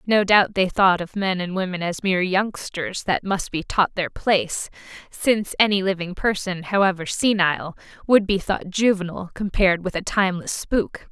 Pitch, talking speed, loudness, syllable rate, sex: 185 Hz, 175 wpm, -21 LUFS, 5.1 syllables/s, female